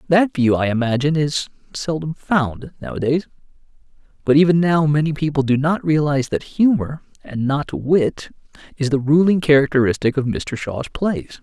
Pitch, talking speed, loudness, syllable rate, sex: 150 Hz, 150 wpm, -18 LUFS, 4.9 syllables/s, male